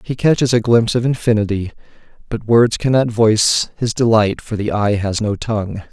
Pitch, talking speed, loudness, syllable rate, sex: 110 Hz, 180 wpm, -16 LUFS, 5.3 syllables/s, male